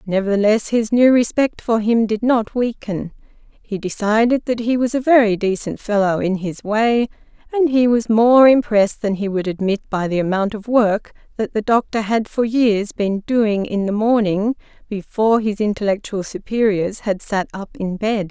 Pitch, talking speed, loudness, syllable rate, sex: 215 Hz, 180 wpm, -18 LUFS, 4.7 syllables/s, female